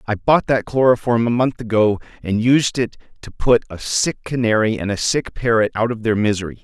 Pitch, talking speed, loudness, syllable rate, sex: 115 Hz, 210 wpm, -18 LUFS, 5.3 syllables/s, male